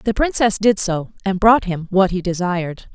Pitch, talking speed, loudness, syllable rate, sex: 190 Hz, 205 wpm, -18 LUFS, 4.8 syllables/s, female